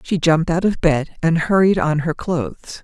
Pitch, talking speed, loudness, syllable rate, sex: 170 Hz, 210 wpm, -18 LUFS, 4.9 syllables/s, female